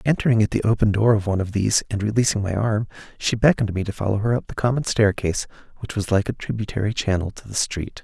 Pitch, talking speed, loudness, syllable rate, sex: 105 Hz, 240 wpm, -22 LUFS, 6.8 syllables/s, male